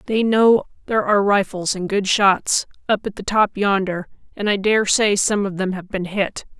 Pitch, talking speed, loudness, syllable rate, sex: 200 Hz, 210 wpm, -19 LUFS, 4.8 syllables/s, female